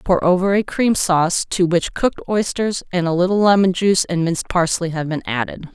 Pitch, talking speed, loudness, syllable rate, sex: 180 Hz, 210 wpm, -18 LUFS, 5.5 syllables/s, female